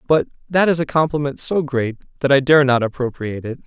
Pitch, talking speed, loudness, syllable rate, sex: 140 Hz, 215 wpm, -18 LUFS, 6.0 syllables/s, male